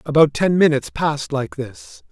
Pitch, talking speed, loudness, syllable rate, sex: 145 Hz, 170 wpm, -18 LUFS, 5.2 syllables/s, male